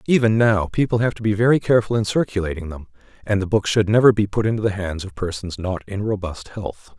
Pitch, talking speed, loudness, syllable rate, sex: 100 Hz, 230 wpm, -20 LUFS, 6.1 syllables/s, male